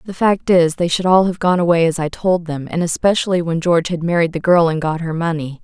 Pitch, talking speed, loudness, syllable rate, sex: 170 Hz, 265 wpm, -16 LUFS, 5.8 syllables/s, female